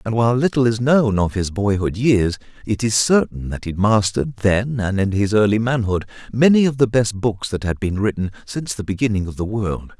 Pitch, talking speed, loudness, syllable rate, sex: 110 Hz, 215 wpm, -19 LUFS, 5.3 syllables/s, male